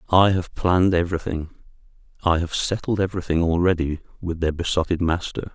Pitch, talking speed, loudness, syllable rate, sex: 85 Hz, 130 wpm, -22 LUFS, 5.9 syllables/s, male